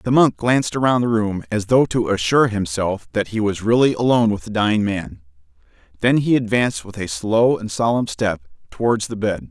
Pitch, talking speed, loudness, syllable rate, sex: 110 Hz, 200 wpm, -19 LUFS, 5.3 syllables/s, male